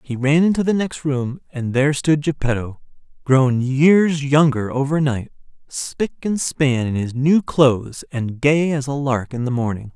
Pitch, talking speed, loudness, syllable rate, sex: 140 Hz, 175 wpm, -19 LUFS, 4.4 syllables/s, male